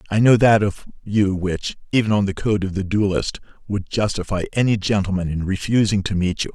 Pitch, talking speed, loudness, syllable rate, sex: 100 Hz, 200 wpm, -20 LUFS, 5.5 syllables/s, male